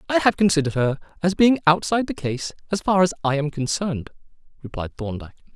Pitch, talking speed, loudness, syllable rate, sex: 165 Hz, 185 wpm, -22 LUFS, 6.7 syllables/s, male